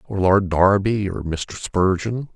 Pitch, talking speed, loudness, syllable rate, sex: 95 Hz, 155 wpm, -20 LUFS, 3.6 syllables/s, male